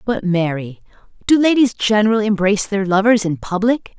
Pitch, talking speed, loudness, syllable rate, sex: 205 Hz, 135 wpm, -16 LUFS, 5.6 syllables/s, female